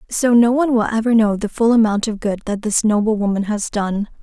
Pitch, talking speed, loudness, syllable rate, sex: 220 Hz, 240 wpm, -17 LUFS, 5.7 syllables/s, female